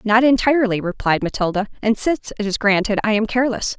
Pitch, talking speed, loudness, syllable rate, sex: 220 Hz, 190 wpm, -18 LUFS, 6.4 syllables/s, female